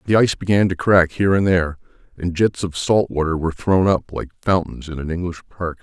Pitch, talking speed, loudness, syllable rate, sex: 90 Hz, 225 wpm, -19 LUFS, 6.1 syllables/s, male